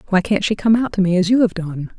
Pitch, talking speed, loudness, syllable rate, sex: 195 Hz, 335 wpm, -17 LUFS, 6.3 syllables/s, female